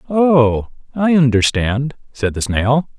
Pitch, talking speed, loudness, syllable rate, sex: 130 Hz, 120 wpm, -16 LUFS, 3.5 syllables/s, male